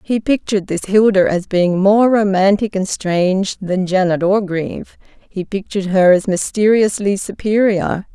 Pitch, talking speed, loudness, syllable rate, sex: 195 Hz, 140 wpm, -15 LUFS, 4.5 syllables/s, female